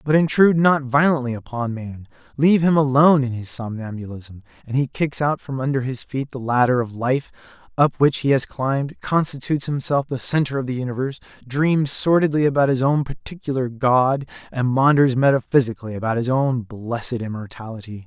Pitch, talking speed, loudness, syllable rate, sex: 130 Hz, 170 wpm, -20 LUFS, 5.5 syllables/s, male